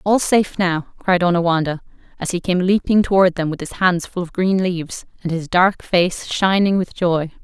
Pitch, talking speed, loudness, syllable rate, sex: 180 Hz, 200 wpm, -18 LUFS, 5.0 syllables/s, female